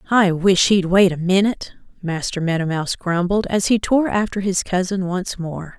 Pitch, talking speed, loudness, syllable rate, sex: 185 Hz, 185 wpm, -19 LUFS, 4.9 syllables/s, female